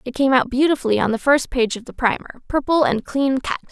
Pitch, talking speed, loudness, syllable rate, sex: 260 Hz, 240 wpm, -19 LUFS, 6.2 syllables/s, female